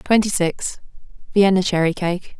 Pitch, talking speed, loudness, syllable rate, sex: 185 Hz, 100 wpm, -19 LUFS, 4.5 syllables/s, female